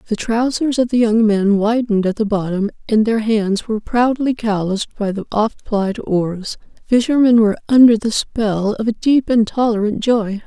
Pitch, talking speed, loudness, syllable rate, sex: 220 Hz, 185 wpm, -16 LUFS, 4.9 syllables/s, female